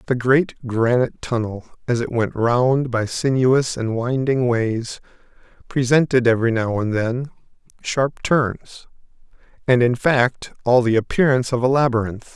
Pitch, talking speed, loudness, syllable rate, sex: 125 Hz, 140 wpm, -19 LUFS, 4.3 syllables/s, male